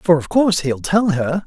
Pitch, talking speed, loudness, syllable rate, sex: 165 Hz, 245 wpm, -17 LUFS, 4.9 syllables/s, male